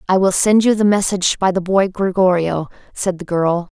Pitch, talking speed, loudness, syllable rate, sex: 185 Hz, 210 wpm, -16 LUFS, 5.1 syllables/s, female